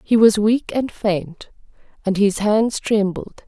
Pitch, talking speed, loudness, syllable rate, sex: 210 Hz, 155 wpm, -19 LUFS, 3.6 syllables/s, female